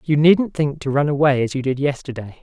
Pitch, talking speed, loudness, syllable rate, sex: 145 Hz, 245 wpm, -18 LUFS, 5.6 syllables/s, male